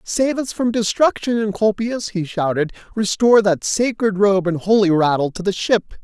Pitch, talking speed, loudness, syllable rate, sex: 205 Hz, 170 wpm, -18 LUFS, 4.9 syllables/s, male